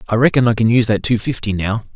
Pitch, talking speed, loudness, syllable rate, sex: 115 Hz, 275 wpm, -16 LUFS, 7.1 syllables/s, male